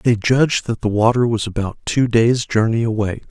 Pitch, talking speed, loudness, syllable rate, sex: 115 Hz, 200 wpm, -17 LUFS, 5.2 syllables/s, male